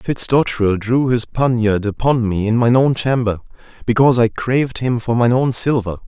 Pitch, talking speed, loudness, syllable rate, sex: 120 Hz, 180 wpm, -16 LUFS, 5.4 syllables/s, male